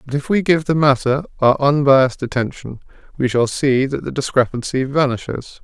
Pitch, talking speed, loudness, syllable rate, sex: 135 Hz, 170 wpm, -17 LUFS, 5.3 syllables/s, male